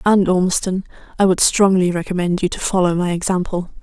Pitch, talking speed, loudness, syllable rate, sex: 185 Hz, 170 wpm, -17 LUFS, 5.8 syllables/s, female